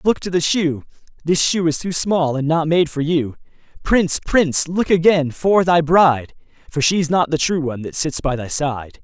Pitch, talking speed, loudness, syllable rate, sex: 160 Hz, 215 wpm, -18 LUFS, 4.8 syllables/s, male